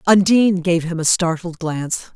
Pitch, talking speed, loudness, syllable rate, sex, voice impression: 175 Hz, 165 wpm, -18 LUFS, 5.2 syllables/s, female, very feminine, adult-like, slightly clear, slightly intellectual, slightly strict